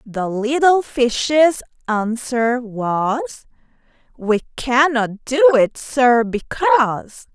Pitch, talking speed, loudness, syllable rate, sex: 250 Hz, 90 wpm, -17 LUFS, 2.8 syllables/s, female